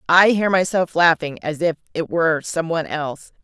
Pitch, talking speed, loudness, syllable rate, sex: 165 Hz, 190 wpm, -19 LUFS, 5.3 syllables/s, female